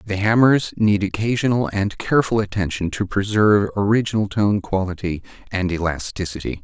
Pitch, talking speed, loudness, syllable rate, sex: 100 Hz, 125 wpm, -20 LUFS, 5.4 syllables/s, male